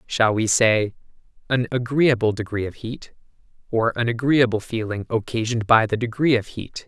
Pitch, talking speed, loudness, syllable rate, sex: 115 Hz, 155 wpm, -21 LUFS, 5.0 syllables/s, male